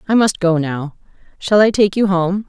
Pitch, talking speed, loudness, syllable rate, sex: 190 Hz, 220 wpm, -15 LUFS, 4.8 syllables/s, female